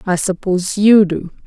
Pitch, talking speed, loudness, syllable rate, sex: 190 Hz, 165 wpm, -14 LUFS, 4.8 syllables/s, female